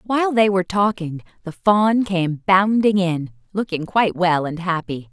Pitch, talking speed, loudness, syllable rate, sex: 185 Hz, 165 wpm, -19 LUFS, 4.6 syllables/s, female